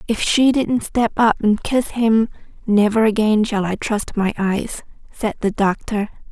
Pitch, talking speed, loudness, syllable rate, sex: 215 Hz, 170 wpm, -18 LUFS, 4.2 syllables/s, female